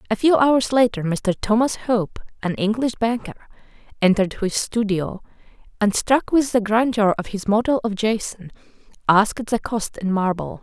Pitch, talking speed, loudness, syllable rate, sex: 220 Hz, 160 wpm, -20 LUFS, 4.8 syllables/s, female